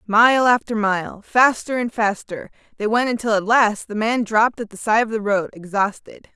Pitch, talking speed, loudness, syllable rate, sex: 220 Hz, 200 wpm, -19 LUFS, 4.8 syllables/s, female